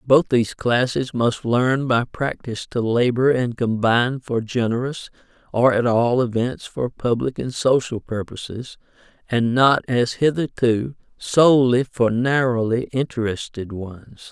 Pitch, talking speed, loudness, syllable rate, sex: 120 Hz, 130 wpm, -20 LUFS, 4.2 syllables/s, male